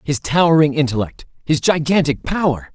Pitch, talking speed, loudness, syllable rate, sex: 150 Hz, 130 wpm, -17 LUFS, 5.2 syllables/s, male